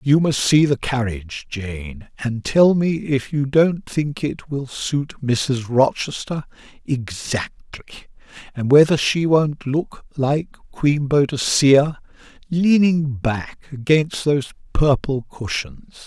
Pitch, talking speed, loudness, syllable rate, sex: 135 Hz, 125 wpm, -19 LUFS, 3.4 syllables/s, male